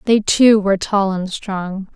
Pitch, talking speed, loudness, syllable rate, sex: 200 Hz, 185 wpm, -16 LUFS, 3.9 syllables/s, female